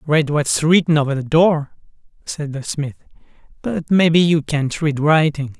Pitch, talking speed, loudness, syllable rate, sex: 155 Hz, 160 wpm, -17 LUFS, 4.4 syllables/s, male